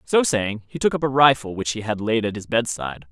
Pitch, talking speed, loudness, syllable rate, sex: 115 Hz, 270 wpm, -21 LUFS, 5.8 syllables/s, male